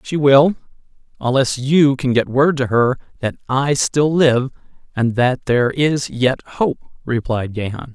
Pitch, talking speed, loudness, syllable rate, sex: 130 Hz, 160 wpm, -17 LUFS, 4.0 syllables/s, male